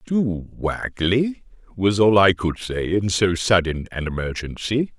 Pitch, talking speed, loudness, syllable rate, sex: 100 Hz, 145 wpm, -21 LUFS, 3.9 syllables/s, male